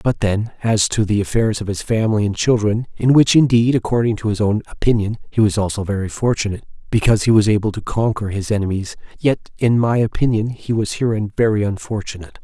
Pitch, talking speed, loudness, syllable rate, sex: 110 Hz, 200 wpm, -18 LUFS, 6.1 syllables/s, male